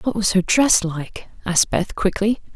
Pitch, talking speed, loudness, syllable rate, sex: 200 Hz, 190 wpm, -19 LUFS, 4.5 syllables/s, female